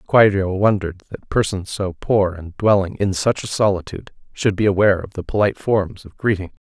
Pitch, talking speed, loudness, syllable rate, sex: 100 Hz, 190 wpm, -19 LUFS, 5.6 syllables/s, male